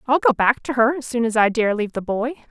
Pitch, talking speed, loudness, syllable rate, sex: 235 Hz, 310 wpm, -20 LUFS, 6.0 syllables/s, female